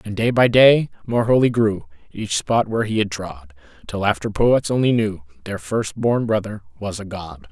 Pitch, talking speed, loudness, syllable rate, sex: 110 Hz, 200 wpm, -19 LUFS, 4.7 syllables/s, male